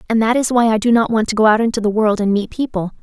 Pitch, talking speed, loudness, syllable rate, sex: 220 Hz, 335 wpm, -16 LUFS, 6.9 syllables/s, female